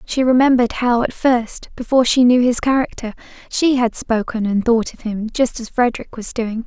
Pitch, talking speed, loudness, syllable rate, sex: 240 Hz, 200 wpm, -17 LUFS, 5.2 syllables/s, female